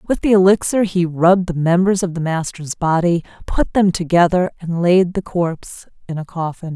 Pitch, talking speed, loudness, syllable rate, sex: 175 Hz, 185 wpm, -17 LUFS, 5.0 syllables/s, female